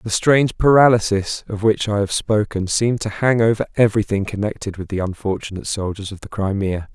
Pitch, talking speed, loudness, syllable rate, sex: 105 Hz, 180 wpm, -19 LUFS, 5.8 syllables/s, male